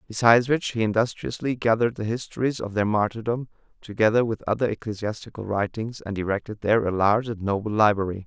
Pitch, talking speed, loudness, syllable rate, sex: 110 Hz, 165 wpm, -24 LUFS, 6.3 syllables/s, male